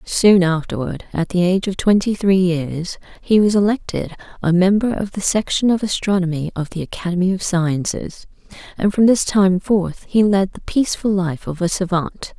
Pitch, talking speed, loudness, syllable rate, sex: 185 Hz, 180 wpm, -18 LUFS, 4.4 syllables/s, female